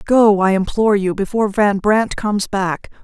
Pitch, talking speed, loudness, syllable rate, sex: 205 Hz, 180 wpm, -16 LUFS, 5.0 syllables/s, female